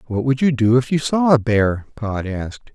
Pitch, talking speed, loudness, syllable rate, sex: 120 Hz, 240 wpm, -18 LUFS, 4.8 syllables/s, male